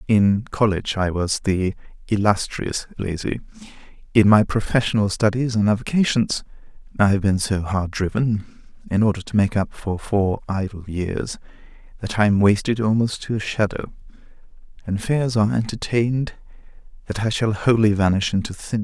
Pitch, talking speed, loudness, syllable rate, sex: 105 Hz, 155 wpm, -21 LUFS, 5.2 syllables/s, male